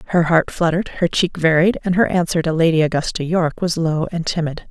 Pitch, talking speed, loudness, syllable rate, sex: 170 Hz, 215 wpm, -18 LUFS, 6.0 syllables/s, female